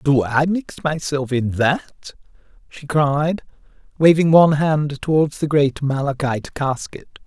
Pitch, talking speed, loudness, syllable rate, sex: 145 Hz, 130 wpm, -18 LUFS, 4.6 syllables/s, male